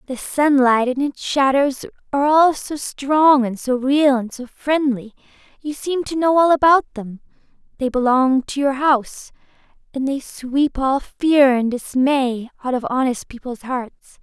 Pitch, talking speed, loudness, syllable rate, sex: 270 Hz, 165 wpm, -18 LUFS, 4.1 syllables/s, female